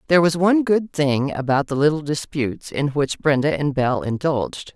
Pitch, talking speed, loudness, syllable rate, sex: 150 Hz, 190 wpm, -20 LUFS, 5.5 syllables/s, female